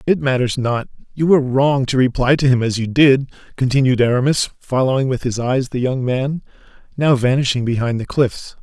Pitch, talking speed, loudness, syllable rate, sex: 130 Hz, 190 wpm, -17 LUFS, 5.3 syllables/s, male